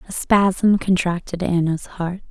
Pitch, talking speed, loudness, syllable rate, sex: 180 Hz, 130 wpm, -19 LUFS, 3.8 syllables/s, female